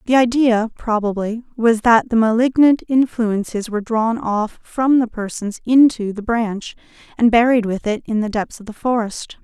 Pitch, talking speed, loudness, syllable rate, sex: 230 Hz, 170 wpm, -17 LUFS, 4.6 syllables/s, female